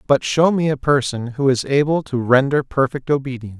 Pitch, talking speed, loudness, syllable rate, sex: 135 Hz, 200 wpm, -18 LUFS, 5.5 syllables/s, male